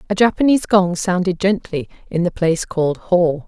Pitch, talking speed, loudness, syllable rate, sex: 185 Hz, 175 wpm, -18 LUFS, 5.5 syllables/s, female